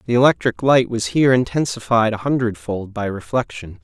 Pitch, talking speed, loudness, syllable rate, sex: 115 Hz, 155 wpm, -18 LUFS, 5.5 syllables/s, male